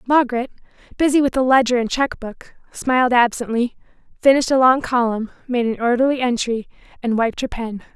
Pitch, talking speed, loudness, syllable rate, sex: 245 Hz, 165 wpm, -18 LUFS, 5.9 syllables/s, female